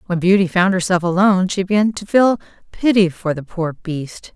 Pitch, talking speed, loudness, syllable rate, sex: 185 Hz, 195 wpm, -17 LUFS, 5.2 syllables/s, female